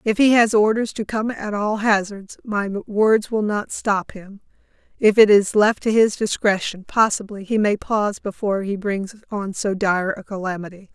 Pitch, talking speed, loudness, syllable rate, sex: 205 Hz, 185 wpm, -20 LUFS, 4.6 syllables/s, female